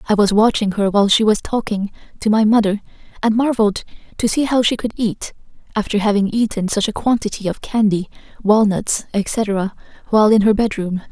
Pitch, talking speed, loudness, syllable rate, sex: 210 Hz, 180 wpm, -17 LUFS, 5.5 syllables/s, female